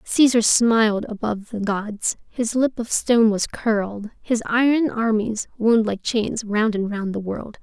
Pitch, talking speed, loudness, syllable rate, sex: 220 Hz, 175 wpm, -21 LUFS, 4.2 syllables/s, female